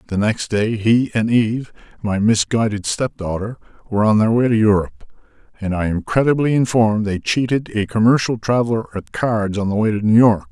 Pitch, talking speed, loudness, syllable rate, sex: 110 Hz, 190 wpm, -18 LUFS, 5.5 syllables/s, male